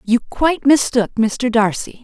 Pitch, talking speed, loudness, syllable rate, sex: 240 Hz, 145 wpm, -16 LUFS, 4.2 syllables/s, female